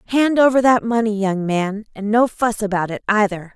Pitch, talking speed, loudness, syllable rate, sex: 215 Hz, 205 wpm, -18 LUFS, 5.1 syllables/s, female